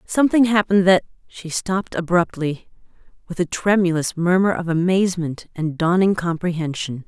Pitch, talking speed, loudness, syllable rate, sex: 175 Hz, 125 wpm, -19 LUFS, 5.3 syllables/s, female